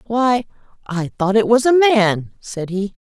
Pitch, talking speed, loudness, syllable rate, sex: 215 Hz, 180 wpm, -17 LUFS, 3.9 syllables/s, female